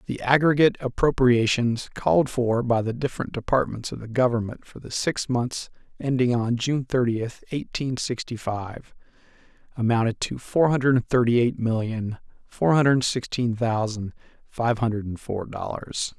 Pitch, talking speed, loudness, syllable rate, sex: 120 Hz, 140 wpm, -24 LUFS, 4.6 syllables/s, male